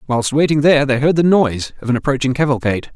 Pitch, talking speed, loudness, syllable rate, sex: 135 Hz, 225 wpm, -15 LUFS, 7.0 syllables/s, male